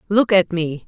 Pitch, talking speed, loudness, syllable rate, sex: 185 Hz, 205 wpm, -17 LUFS, 4.4 syllables/s, female